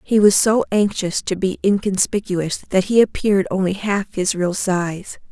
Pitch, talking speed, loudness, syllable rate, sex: 195 Hz, 170 wpm, -18 LUFS, 4.4 syllables/s, female